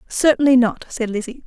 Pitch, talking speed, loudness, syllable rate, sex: 245 Hz, 165 wpm, -18 LUFS, 5.5 syllables/s, female